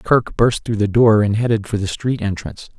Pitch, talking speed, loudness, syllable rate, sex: 105 Hz, 235 wpm, -17 LUFS, 5.2 syllables/s, male